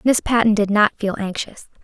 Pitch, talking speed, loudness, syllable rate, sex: 210 Hz, 195 wpm, -18 LUFS, 4.9 syllables/s, female